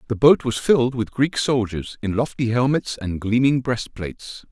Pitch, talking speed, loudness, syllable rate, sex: 120 Hz, 175 wpm, -21 LUFS, 4.7 syllables/s, male